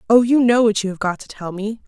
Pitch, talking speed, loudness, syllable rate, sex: 215 Hz, 320 wpm, -18 LUFS, 6.1 syllables/s, female